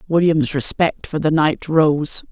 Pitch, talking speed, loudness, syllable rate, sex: 155 Hz, 155 wpm, -17 LUFS, 3.8 syllables/s, female